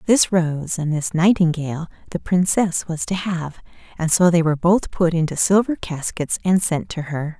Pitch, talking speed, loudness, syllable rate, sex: 170 Hz, 185 wpm, -19 LUFS, 4.8 syllables/s, female